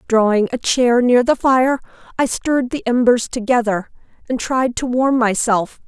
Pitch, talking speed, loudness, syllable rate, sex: 245 Hz, 165 wpm, -17 LUFS, 4.5 syllables/s, female